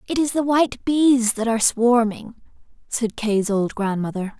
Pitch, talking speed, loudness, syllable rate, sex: 230 Hz, 165 wpm, -20 LUFS, 4.6 syllables/s, female